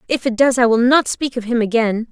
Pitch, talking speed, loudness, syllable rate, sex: 240 Hz, 285 wpm, -16 LUFS, 5.7 syllables/s, female